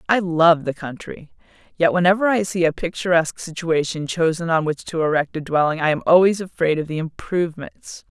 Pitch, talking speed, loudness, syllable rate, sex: 165 Hz, 185 wpm, -20 LUFS, 5.5 syllables/s, female